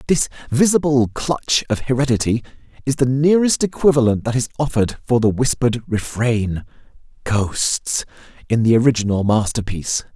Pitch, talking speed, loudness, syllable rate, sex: 125 Hz, 125 wpm, -18 LUFS, 5.3 syllables/s, male